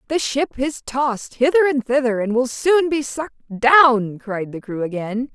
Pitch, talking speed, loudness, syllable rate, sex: 255 Hz, 190 wpm, -19 LUFS, 4.7 syllables/s, female